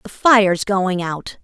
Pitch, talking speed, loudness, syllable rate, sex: 195 Hz, 165 wpm, -16 LUFS, 3.8 syllables/s, female